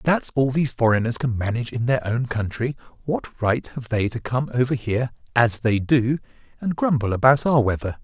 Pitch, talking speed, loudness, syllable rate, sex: 125 Hz, 200 wpm, -22 LUFS, 5.5 syllables/s, male